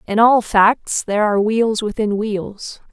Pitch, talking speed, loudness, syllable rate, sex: 215 Hz, 165 wpm, -17 LUFS, 4.1 syllables/s, female